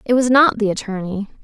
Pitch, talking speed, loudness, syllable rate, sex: 220 Hz, 210 wpm, -17 LUFS, 5.7 syllables/s, female